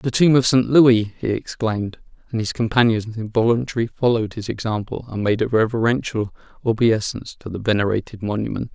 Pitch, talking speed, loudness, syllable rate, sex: 115 Hz, 160 wpm, -20 LUFS, 5.9 syllables/s, male